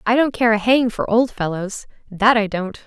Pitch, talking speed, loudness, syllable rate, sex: 220 Hz, 230 wpm, -18 LUFS, 4.8 syllables/s, female